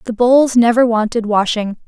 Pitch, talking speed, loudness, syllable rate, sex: 230 Hz, 160 wpm, -14 LUFS, 4.7 syllables/s, female